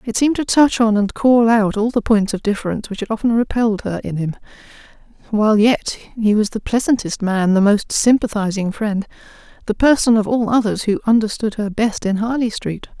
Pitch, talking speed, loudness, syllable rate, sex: 220 Hz, 200 wpm, -17 LUFS, 5.5 syllables/s, female